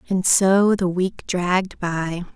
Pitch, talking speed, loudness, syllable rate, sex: 185 Hz, 155 wpm, -20 LUFS, 3.4 syllables/s, female